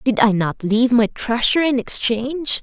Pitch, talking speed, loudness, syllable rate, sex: 240 Hz, 185 wpm, -18 LUFS, 5.1 syllables/s, female